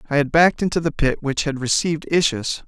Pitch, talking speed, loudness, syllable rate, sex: 150 Hz, 225 wpm, -19 LUFS, 6.3 syllables/s, male